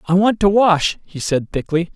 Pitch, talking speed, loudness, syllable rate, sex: 180 Hz, 215 wpm, -17 LUFS, 4.5 syllables/s, male